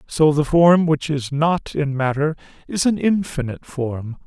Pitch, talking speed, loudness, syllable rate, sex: 150 Hz, 170 wpm, -19 LUFS, 4.2 syllables/s, male